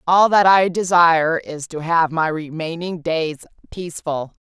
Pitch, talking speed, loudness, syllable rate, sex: 165 Hz, 150 wpm, -18 LUFS, 4.4 syllables/s, female